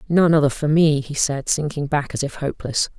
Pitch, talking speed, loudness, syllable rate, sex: 145 Hz, 220 wpm, -20 LUFS, 5.5 syllables/s, female